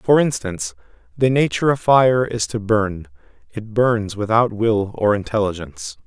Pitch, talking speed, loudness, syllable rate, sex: 115 Hz, 150 wpm, -19 LUFS, 4.7 syllables/s, male